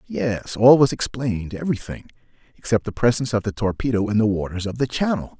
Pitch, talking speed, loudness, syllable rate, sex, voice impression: 115 Hz, 180 wpm, -21 LUFS, 6.1 syllables/s, male, very masculine, very adult-like, very middle-aged, very thick, slightly relaxed, powerful, slightly dark, soft, slightly muffled, fluent, slightly raspy, cool, very intellectual, sincere, very calm, very mature, friendly, reassuring, unique, slightly elegant, wild, sweet, slightly lively, very kind, modest